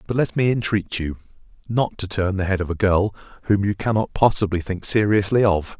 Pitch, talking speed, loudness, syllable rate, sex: 100 Hz, 205 wpm, -21 LUFS, 5.4 syllables/s, male